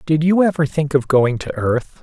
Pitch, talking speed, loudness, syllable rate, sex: 145 Hz, 235 wpm, -17 LUFS, 4.8 syllables/s, male